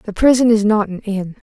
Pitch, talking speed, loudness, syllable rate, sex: 215 Hz, 240 wpm, -16 LUFS, 5.2 syllables/s, female